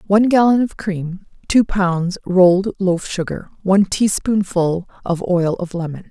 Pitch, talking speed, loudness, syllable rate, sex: 190 Hz, 155 wpm, -17 LUFS, 4.4 syllables/s, female